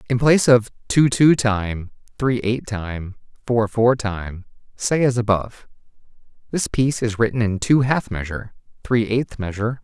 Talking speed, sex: 175 wpm, male